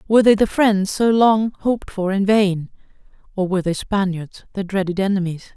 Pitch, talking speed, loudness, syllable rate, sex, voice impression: 200 Hz, 185 wpm, -18 LUFS, 5.3 syllables/s, female, very feminine, adult-like, slightly soft, fluent, slightly intellectual, elegant